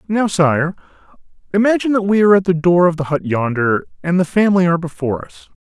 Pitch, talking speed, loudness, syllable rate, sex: 170 Hz, 200 wpm, -16 LUFS, 6.6 syllables/s, male